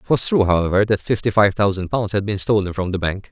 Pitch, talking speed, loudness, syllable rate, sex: 100 Hz, 270 wpm, -19 LUFS, 6.2 syllables/s, male